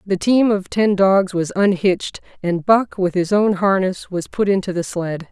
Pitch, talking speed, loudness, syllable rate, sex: 190 Hz, 205 wpm, -18 LUFS, 4.4 syllables/s, female